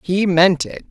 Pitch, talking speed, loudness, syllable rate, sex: 185 Hz, 200 wpm, -16 LUFS, 3.9 syllables/s, female